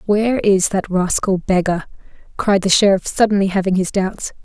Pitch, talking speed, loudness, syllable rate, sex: 195 Hz, 160 wpm, -17 LUFS, 5.1 syllables/s, female